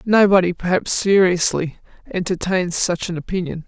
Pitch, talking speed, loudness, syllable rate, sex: 180 Hz, 115 wpm, -18 LUFS, 4.9 syllables/s, female